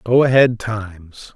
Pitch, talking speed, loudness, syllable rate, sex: 110 Hz, 135 wpm, -16 LUFS, 4.1 syllables/s, male